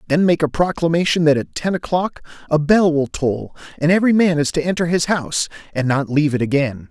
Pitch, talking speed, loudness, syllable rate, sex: 155 Hz, 215 wpm, -18 LUFS, 6.0 syllables/s, male